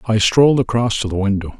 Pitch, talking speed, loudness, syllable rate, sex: 110 Hz, 225 wpm, -16 LUFS, 6.2 syllables/s, male